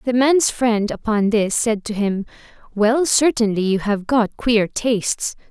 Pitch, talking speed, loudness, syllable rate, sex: 225 Hz, 165 wpm, -18 LUFS, 4.1 syllables/s, female